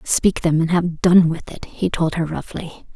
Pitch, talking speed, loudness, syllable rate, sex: 165 Hz, 225 wpm, -19 LUFS, 4.3 syllables/s, female